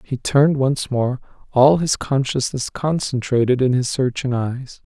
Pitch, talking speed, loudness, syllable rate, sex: 130 Hz, 145 wpm, -19 LUFS, 4.3 syllables/s, male